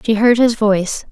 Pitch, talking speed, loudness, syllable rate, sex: 220 Hz, 215 wpm, -14 LUFS, 5.0 syllables/s, female